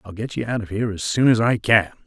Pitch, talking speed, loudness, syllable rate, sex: 110 Hz, 320 wpm, -20 LUFS, 6.5 syllables/s, male